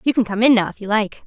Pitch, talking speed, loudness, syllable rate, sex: 220 Hz, 380 wpm, -18 LUFS, 6.9 syllables/s, female